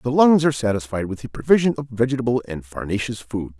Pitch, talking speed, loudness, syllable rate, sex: 120 Hz, 200 wpm, -21 LUFS, 6.5 syllables/s, male